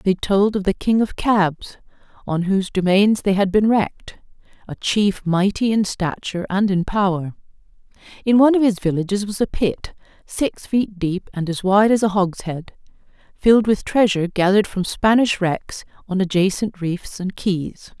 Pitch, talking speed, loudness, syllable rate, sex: 195 Hz, 170 wpm, -19 LUFS, 4.7 syllables/s, female